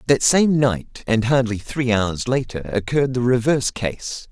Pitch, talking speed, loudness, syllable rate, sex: 120 Hz, 165 wpm, -20 LUFS, 4.4 syllables/s, male